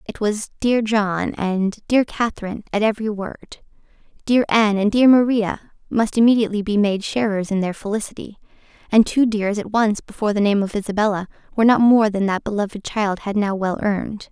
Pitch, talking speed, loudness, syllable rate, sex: 210 Hz, 185 wpm, -19 LUFS, 5.5 syllables/s, female